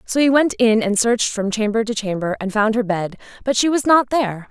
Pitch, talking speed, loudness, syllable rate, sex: 225 Hz, 255 wpm, -18 LUFS, 5.6 syllables/s, female